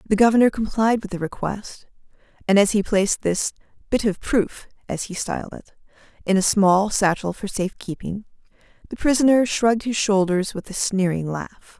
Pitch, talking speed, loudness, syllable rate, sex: 205 Hz, 175 wpm, -21 LUFS, 5.0 syllables/s, female